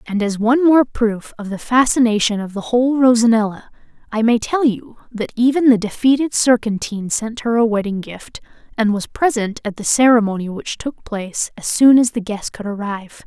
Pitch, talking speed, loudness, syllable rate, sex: 230 Hz, 190 wpm, -17 LUFS, 5.4 syllables/s, female